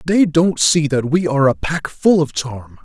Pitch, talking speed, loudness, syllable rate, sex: 150 Hz, 230 wpm, -16 LUFS, 4.5 syllables/s, male